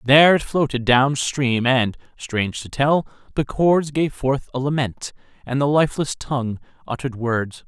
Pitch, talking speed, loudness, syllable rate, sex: 135 Hz, 165 wpm, -20 LUFS, 4.7 syllables/s, male